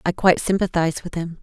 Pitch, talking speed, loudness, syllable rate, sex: 170 Hz, 210 wpm, -21 LUFS, 6.8 syllables/s, female